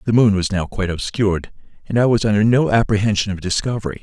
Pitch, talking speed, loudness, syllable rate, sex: 105 Hz, 210 wpm, -18 LUFS, 6.7 syllables/s, male